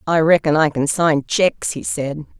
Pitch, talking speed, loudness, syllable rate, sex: 155 Hz, 200 wpm, -17 LUFS, 4.7 syllables/s, female